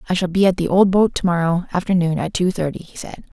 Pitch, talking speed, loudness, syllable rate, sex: 180 Hz, 250 wpm, -18 LUFS, 6.3 syllables/s, female